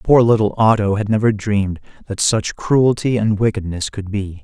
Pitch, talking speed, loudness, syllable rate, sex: 105 Hz, 175 wpm, -17 LUFS, 4.9 syllables/s, male